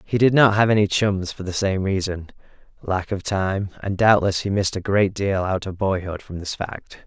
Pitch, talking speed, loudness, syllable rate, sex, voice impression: 95 Hz, 220 wpm, -21 LUFS, 4.9 syllables/s, male, very masculine, very middle-aged, very thick, tensed, powerful, dark, soft, muffled, slightly fluent, raspy, cool, intellectual, slightly refreshing, sincere, calm, very mature, friendly, reassuring, very unique, elegant, very wild, very sweet, lively, very kind, modest